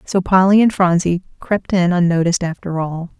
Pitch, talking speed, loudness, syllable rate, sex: 180 Hz, 170 wpm, -16 LUFS, 5.2 syllables/s, female